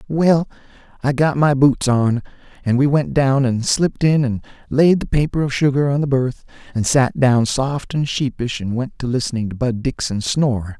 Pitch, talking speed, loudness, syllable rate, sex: 130 Hz, 200 wpm, -18 LUFS, 4.8 syllables/s, male